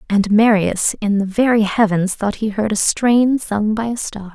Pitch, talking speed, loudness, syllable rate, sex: 210 Hz, 205 wpm, -16 LUFS, 4.4 syllables/s, female